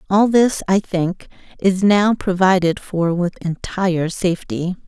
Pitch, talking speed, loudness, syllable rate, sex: 185 Hz, 135 wpm, -18 LUFS, 4.2 syllables/s, female